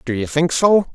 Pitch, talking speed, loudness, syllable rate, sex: 155 Hz, 255 wpm, -17 LUFS, 4.9 syllables/s, male